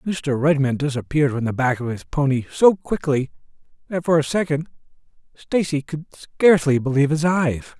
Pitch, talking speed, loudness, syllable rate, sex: 145 Hz, 160 wpm, -20 LUFS, 5.3 syllables/s, male